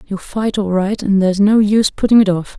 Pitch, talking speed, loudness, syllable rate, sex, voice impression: 200 Hz, 255 wpm, -14 LUFS, 5.6 syllables/s, female, feminine, slightly adult-like, soft, slightly cute, calm, sweet, kind